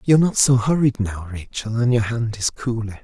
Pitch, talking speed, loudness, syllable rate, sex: 115 Hz, 215 wpm, -20 LUFS, 5.2 syllables/s, male